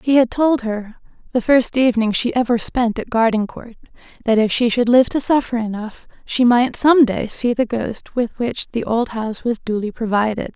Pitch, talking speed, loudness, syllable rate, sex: 235 Hz, 200 wpm, -18 LUFS, 4.9 syllables/s, female